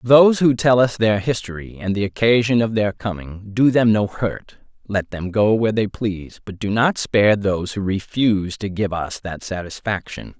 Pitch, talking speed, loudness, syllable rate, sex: 105 Hz, 195 wpm, -19 LUFS, 4.9 syllables/s, male